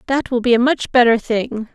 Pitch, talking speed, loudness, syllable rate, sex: 240 Hz, 240 wpm, -16 LUFS, 5.2 syllables/s, female